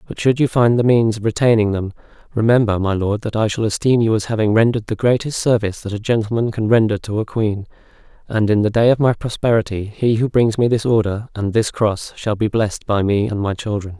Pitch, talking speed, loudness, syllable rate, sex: 110 Hz, 235 wpm, -18 LUFS, 5.9 syllables/s, male